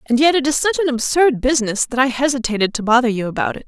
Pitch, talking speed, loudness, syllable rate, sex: 260 Hz, 260 wpm, -17 LUFS, 6.7 syllables/s, female